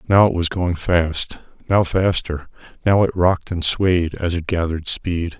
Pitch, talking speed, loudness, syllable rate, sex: 85 Hz, 180 wpm, -19 LUFS, 4.4 syllables/s, male